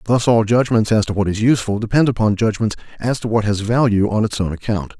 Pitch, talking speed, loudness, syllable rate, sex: 110 Hz, 240 wpm, -17 LUFS, 6.6 syllables/s, male